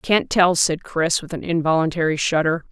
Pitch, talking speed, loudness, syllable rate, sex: 165 Hz, 175 wpm, -19 LUFS, 4.9 syllables/s, female